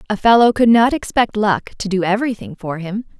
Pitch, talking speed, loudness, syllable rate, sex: 210 Hz, 205 wpm, -16 LUFS, 5.7 syllables/s, female